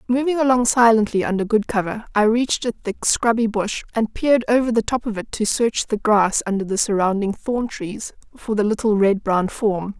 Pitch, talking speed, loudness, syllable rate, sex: 220 Hz, 205 wpm, -19 LUFS, 5.2 syllables/s, female